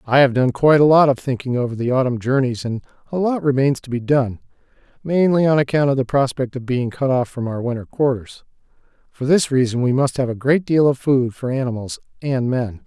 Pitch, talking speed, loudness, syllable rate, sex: 130 Hz, 225 wpm, -18 LUFS, 5.7 syllables/s, male